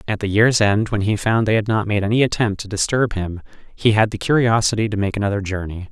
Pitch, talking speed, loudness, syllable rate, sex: 105 Hz, 245 wpm, -19 LUFS, 6.0 syllables/s, male